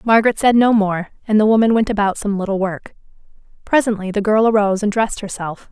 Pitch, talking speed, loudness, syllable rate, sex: 210 Hz, 200 wpm, -17 LUFS, 6.3 syllables/s, female